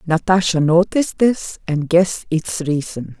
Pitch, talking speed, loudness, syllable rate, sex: 170 Hz, 130 wpm, -17 LUFS, 4.5 syllables/s, female